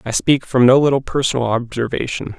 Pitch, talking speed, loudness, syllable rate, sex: 130 Hz, 175 wpm, -17 LUFS, 5.7 syllables/s, male